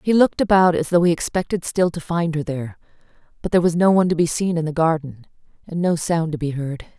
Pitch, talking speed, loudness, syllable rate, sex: 165 Hz, 250 wpm, -20 LUFS, 6.4 syllables/s, female